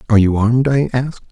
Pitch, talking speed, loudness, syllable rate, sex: 120 Hz, 230 wpm, -15 LUFS, 7.2 syllables/s, male